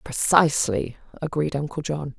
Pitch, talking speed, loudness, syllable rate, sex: 145 Hz, 110 wpm, -23 LUFS, 4.9 syllables/s, female